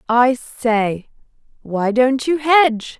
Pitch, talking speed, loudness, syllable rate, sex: 245 Hz, 100 wpm, -17 LUFS, 3.4 syllables/s, female